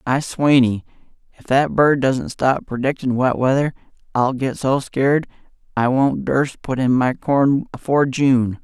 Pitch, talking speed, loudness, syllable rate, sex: 130 Hz, 160 wpm, -18 LUFS, 4.3 syllables/s, male